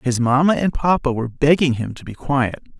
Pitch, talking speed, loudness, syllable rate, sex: 135 Hz, 215 wpm, -18 LUFS, 5.5 syllables/s, male